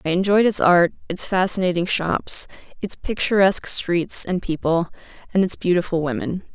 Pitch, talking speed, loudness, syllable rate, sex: 180 Hz, 145 wpm, -20 LUFS, 5.0 syllables/s, female